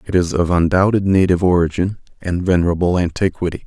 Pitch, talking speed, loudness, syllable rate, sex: 90 Hz, 145 wpm, -17 LUFS, 6.3 syllables/s, male